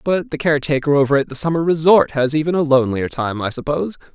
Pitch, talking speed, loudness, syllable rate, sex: 150 Hz, 215 wpm, -17 LUFS, 6.7 syllables/s, male